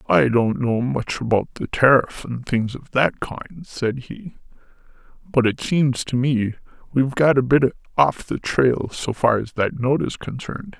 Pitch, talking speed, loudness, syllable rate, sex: 130 Hz, 185 wpm, -21 LUFS, 4.4 syllables/s, male